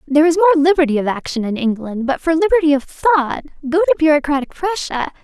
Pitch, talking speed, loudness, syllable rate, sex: 300 Hz, 195 wpm, -16 LUFS, 7.3 syllables/s, female